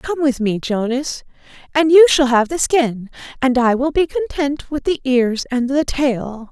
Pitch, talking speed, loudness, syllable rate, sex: 270 Hz, 195 wpm, -17 LUFS, 4.2 syllables/s, female